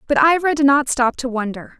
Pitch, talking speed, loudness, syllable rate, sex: 270 Hz, 235 wpm, -17 LUFS, 5.5 syllables/s, female